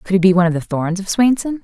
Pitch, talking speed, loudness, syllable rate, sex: 195 Hz, 330 wpm, -16 LUFS, 7.2 syllables/s, female